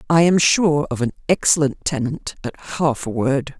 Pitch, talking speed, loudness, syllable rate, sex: 145 Hz, 185 wpm, -19 LUFS, 4.6 syllables/s, female